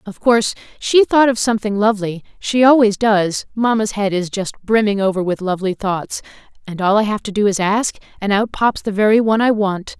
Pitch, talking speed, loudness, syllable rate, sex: 210 Hz, 210 wpm, -16 LUFS, 5.6 syllables/s, female